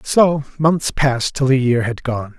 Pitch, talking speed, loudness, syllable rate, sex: 135 Hz, 200 wpm, -17 LUFS, 4.2 syllables/s, male